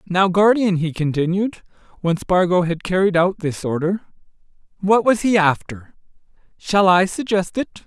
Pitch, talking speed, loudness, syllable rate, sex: 185 Hz, 145 wpm, -18 LUFS, 4.8 syllables/s, male